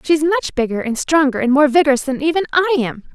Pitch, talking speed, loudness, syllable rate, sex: 290 Hz, 230 wpm, -16 LUFS, 6.5 syllables/s, female